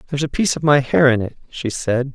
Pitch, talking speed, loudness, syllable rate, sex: 130 Hz, 280 wpm, -18 LUFS, 6.7 syllables/s, male